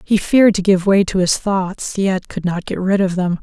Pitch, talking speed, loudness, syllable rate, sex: 190 Hz, 265 wpm, -16 LUFS, 4.9 syllables/s, female